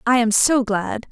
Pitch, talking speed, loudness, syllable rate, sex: 230 Hz, 215 wpm, -18 LUFS, 4.1 syllables/s, female